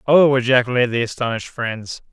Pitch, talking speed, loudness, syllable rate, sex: 125 Hz, 140 wpm, -18 LUFS, 6.3 syllables/s, male